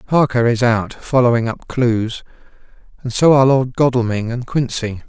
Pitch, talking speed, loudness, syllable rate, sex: 120 Hz, 155 wpm, -16 LUFS, 4.7 syllables/s, male